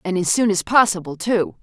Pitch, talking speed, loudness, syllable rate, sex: 190 Hz, 220 wpm, -18 LUFS, 5.3 syllables/s, female